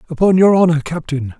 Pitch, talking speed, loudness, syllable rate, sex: 160 Hz, 170 wpm, -14 LUFS, 5.9 syllables/s, male